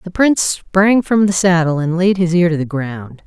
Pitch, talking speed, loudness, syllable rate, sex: 180 Hz, 240 wpm, -14 LUFS, 4.8 syllables/s, female